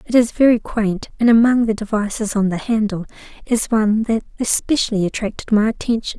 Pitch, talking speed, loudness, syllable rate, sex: 220 Hz, 175 wpm, -18 LUFS, 5.7 syllables/s, female